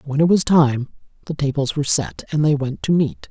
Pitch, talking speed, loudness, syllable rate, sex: 145 Hz, 235 wpm, -19 LUFS, 5.5 syllables/s, male